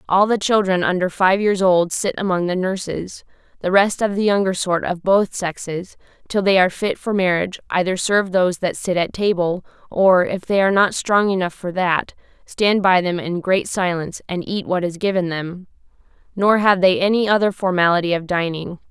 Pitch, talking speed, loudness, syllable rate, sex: 185 Hz, 195 wpm, -19 LUFS, 5.2 syllables/s, female